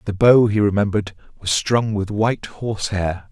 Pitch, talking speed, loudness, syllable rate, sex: 100 Hz, 165 wpm, -19 LUFS, 5.1 syllables/s, male